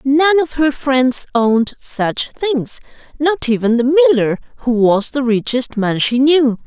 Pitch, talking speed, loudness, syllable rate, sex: 260 Hz, 160 wpm, -15 LUFS, 4.3 syllables/s, female